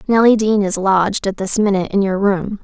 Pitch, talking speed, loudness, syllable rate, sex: 200 Hz, 230 wpm, -16 LUFS, 5.7 syllables/s, female